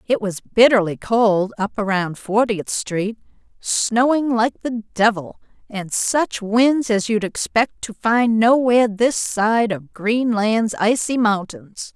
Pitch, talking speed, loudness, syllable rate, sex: 220 Hz, 135 wpm, -18 LUFS, 3.5 syllables/s, female